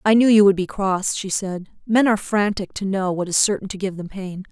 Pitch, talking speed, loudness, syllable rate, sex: 195 Hz, 265 wpm, -20 LUFS, 5.4 syllables/s, female